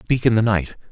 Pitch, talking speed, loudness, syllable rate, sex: 105 Hz, 265 wpm, -19 LUFS, 5.7 syllables/s, male